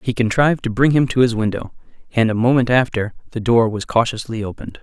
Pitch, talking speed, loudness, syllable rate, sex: 120 Hz, 210 wpm, -18 LUFS, 6.3 syllables/s, male